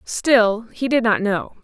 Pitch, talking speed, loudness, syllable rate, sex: 230 Hz, 185 wpm, -18 LUFS, 3.5 syllables/s, female